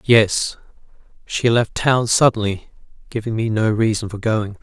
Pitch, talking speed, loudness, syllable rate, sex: 110 Hz, 145 wpm, -19 LUFS, 4.4 syllables/s, male